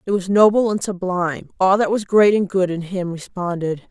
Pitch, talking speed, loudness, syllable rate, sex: 190 Hz, 215 wpm, -18 LUFS, 5.2 syllables/s, female